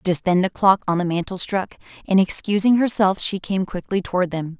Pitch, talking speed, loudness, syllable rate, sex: 190 Hz, 210 wpm, -20 LUFS, 5.5 syllables/s, female